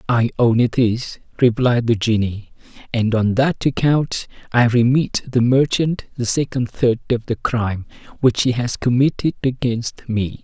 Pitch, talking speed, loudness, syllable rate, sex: 120 Hz, 155 wpm, -18 LUFS, 4.2 syllables/s, male